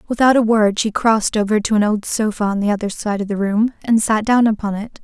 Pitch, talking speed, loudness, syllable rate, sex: 215 Hz, 260 wpm, -17 LUFS, 5.9 syllables/s, female